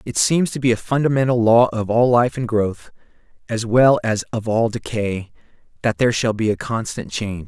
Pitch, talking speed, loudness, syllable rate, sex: 115 Hz, 200 wpm, -19 LUFS, 5.1 syllables/s, male